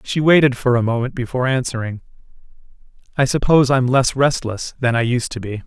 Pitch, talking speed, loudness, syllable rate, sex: 125 Hz, 180 wpm, -18 LUFS, 5.9 syllables/s, male